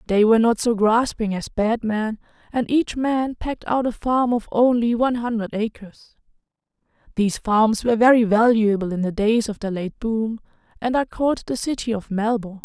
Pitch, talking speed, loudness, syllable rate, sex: 225 Hz, 180 wpm, -21 LUFS, 5.3 syllables/s, female